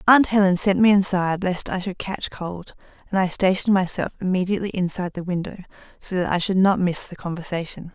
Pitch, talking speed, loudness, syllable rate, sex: 185 Hz, 195 wpm, -22 LUFS, 6.1 syllables/s, female